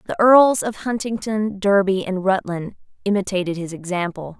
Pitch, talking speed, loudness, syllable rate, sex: 195 Hz, 135 wpm, -20 LUFS, 4.9 syllables/s, female